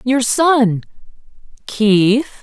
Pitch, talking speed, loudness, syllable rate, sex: 235 Hz, 75 wpm, -14 LUFS, 2.0 syllables/s, female